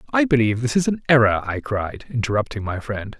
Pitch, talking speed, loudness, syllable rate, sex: 125 Hz, 205 wpm, -21 LUFS, 6.2 syllables/s, male